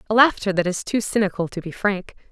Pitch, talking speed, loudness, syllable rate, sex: 200 Hz, 235 wpm, -21 LUFS, 6.1 syllables/s, female